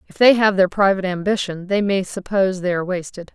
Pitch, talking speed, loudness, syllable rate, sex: 190 Hz, 215 wpm, -19 LUFS, 6.3 syllables/s, female